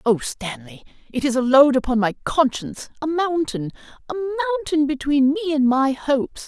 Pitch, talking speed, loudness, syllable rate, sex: 280 Hz, 150 wpm, -20 LUFS, 5.4 syllables/s, female